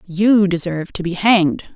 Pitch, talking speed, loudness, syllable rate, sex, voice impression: 185 Hz, 170 wpm, -16 LUFS, 5.2 syllables/s, female, feminine, middle-aged, tensed, powerful, slightly hard, clear, fluent, intellectual, calm, elegant, lively, slightly strict, sharp